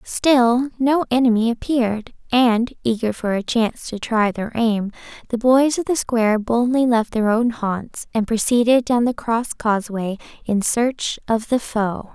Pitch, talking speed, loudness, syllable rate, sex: 235 Hz, 165 wpm, -19 LUFS, 4.4 syllables/s, female